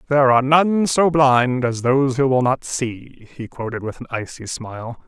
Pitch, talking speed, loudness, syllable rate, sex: 130 Hz, 200 wpm, -18 LUFS, 4.9 syllables/s, male